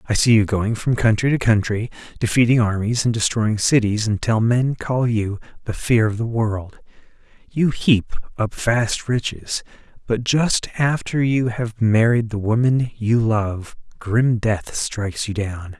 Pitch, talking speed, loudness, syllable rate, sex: 115 Hz, 160 wpm, -20 LUFS, 4.1 syllables/s, male